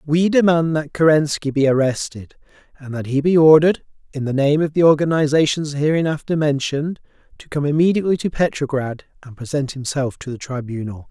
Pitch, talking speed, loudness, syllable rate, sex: 145 Hz, 160 wpm, -18 LUFS, 5.7 syllables/s, male